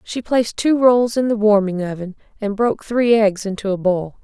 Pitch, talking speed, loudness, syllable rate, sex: 215 Hz, 215 wpm, -18 LUFS, 5.2 syllables/s, female